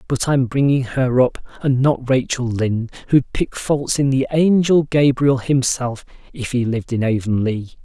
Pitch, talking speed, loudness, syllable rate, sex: 130 Hz, 170 wpm, -18 LUFS, 4.6 syllables/s, male